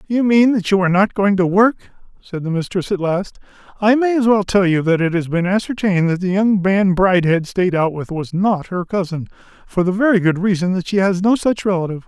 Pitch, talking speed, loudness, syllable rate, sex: 190 Hz, 240 wpm, -17 LUFS, 5.6 syllables/s, male